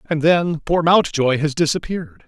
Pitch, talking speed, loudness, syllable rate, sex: 155 Hz, 160 wpm, -18 LUFS, 4.6 syllables/s, male